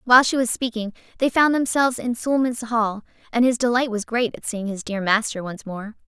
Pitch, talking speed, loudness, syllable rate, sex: 230 Hz, 215 wpm, -22 LUFS, 5.7 syllables/s, female